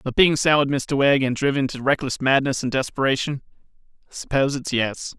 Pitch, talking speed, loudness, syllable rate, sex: 135 Hz, 185 wpm, -21 LUFS, 5.6 syllables/s, male